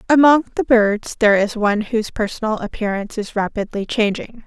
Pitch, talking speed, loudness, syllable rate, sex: 215 Hz, 160 wpm, -18 LUFS, 5.9 syllables/s, female